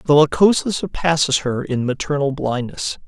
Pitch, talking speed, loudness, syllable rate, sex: 145 Hz, 135 wpm, -18 LUFS, 4.7 syllables/s, male